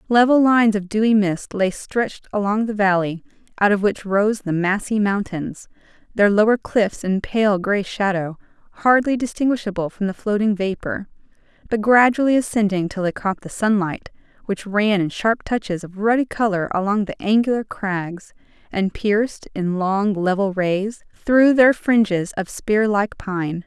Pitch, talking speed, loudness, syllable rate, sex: 205 Hz, 155 wpm, -19 LUFS, 4.6 syllables/s, female